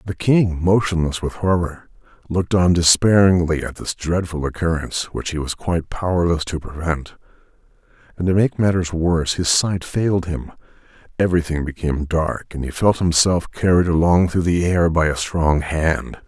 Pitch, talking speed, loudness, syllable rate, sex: 85 Hz, 160 wpm, -19 LUFS, 5.0 syllables/s, male